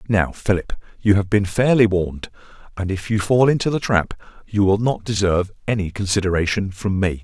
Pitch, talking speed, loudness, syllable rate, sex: 100 Hz, 180 wpm, -20 LUFS, 5.5 syllables/s, male